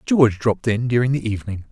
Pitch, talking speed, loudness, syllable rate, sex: 115 Hz, 210 wpm, -20 LUFS, 7.0 syllables/s, male